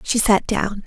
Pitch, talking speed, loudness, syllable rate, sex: 210 Hz, 210 wpm, -19 LUFS, 4.0 syllables/s, female